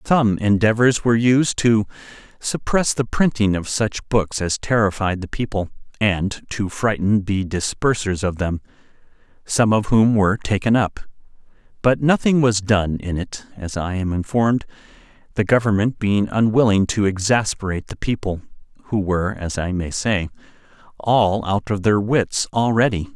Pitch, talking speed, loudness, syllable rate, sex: 105 Hz, 150 wpm, -19 LUFS, 4.7 syllables/s, male